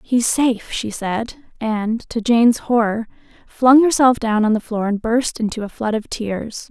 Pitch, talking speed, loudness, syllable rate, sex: 230 Hz, 180 wpm, -18 LUFS, 4.2 syllables/s, female